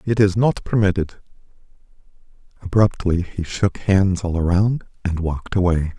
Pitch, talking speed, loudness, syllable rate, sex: 95 Hz, 130 wpm, -20 LUFS, 4.7 syllables/s, male